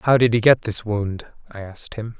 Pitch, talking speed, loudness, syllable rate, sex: 110 Hz, 245 wpm, -19 LUFS, 5.1 syllables/s, male